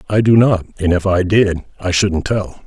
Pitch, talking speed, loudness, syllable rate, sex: 95 Hz, 225 wpm, -15 LUFS, 4.6 syllables/s, male